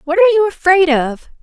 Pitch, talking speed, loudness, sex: 345 Hz, 210 wpm, -13 LUFS, female